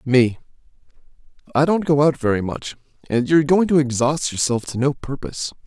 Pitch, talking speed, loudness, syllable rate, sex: 135 Hz, 170 wpm, -19 LUFS, 5.5 syllables/s, male